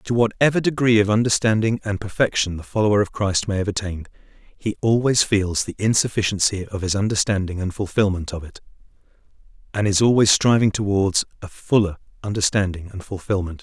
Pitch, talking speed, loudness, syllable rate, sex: 100 Hz, 160 wpm, -20 LUFS, 5.8 syllables/s, male